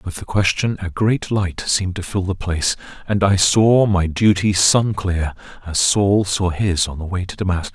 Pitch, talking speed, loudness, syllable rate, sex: 95 Hz, 215 wpm, -18 LUFS, 4.8 syllables/s, male